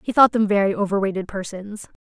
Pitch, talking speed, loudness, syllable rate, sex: 205 Hz, 210 wpm, -20 LUFS, 6.0 syllables/s, female